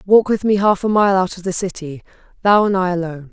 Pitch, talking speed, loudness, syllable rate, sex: 190 Hz, 255 wpm, -16 LUFS, 6.2 syllables/s, female